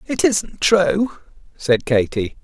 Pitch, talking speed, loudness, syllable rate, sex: 170 Hz, 125 wpm, -18 LUFS, 3.1 syllables/s, male